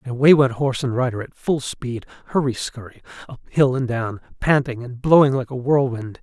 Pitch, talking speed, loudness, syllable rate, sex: 130 Hz, 175 wpm, -20 LUFS, 5.5 syllables/s, male